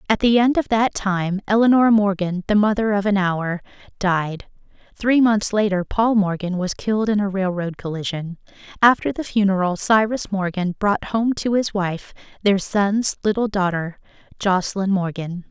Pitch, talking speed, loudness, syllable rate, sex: 200 Hz, 160 wpm, -20 LUFS, 4.7 syllables/s, female